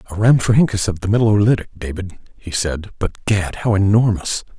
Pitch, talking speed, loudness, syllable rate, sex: 100 Hz, 170 wpm, -17 LUFS, 5.6 syllables/s, male